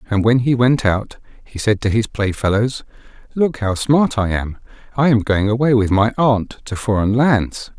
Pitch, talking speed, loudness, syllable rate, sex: 115 Hz, 200 wpm, -17 LUFS, 4.5 syllables/s, male